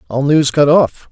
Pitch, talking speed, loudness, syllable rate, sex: 145 Hz, 215 wpm, -12 LUFS, 4.5 syllables/s, male